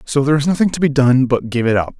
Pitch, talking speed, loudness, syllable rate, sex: 135 Hz, 330 wpm, -15 LUFS, 7.0 syllables/s, male